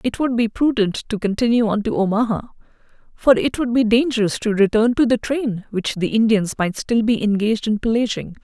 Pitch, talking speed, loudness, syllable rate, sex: 225 Hz, 200 wpm, -19 LUFS, 5.4 syllables/s, female